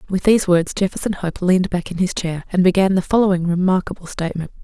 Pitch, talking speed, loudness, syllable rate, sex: 180 Hz, 205 wpm, -18 LUFS, 6.5 syllables/s, female